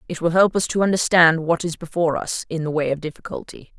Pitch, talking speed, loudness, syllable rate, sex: 165 Hz, 240 wpm, -20 LUFS, 6.3 syllables/s, female